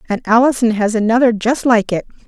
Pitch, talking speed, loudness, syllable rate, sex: 230 Hz, 185 wpm, -14 LUFS, 5.9 syllables/s, female